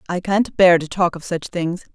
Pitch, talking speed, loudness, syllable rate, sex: 180 Hz, 245 wpm, -18 LUFS, 5.0 syllables/s, female